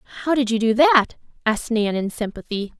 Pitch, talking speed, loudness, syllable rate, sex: 235 Hz, 195 wpm, -20 LUFS, 6.1 syllables/s, female